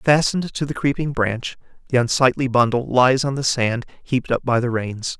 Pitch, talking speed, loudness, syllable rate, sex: 130 Hz, 195 wpm, -20 LUFS, 5.2 syllables/s, male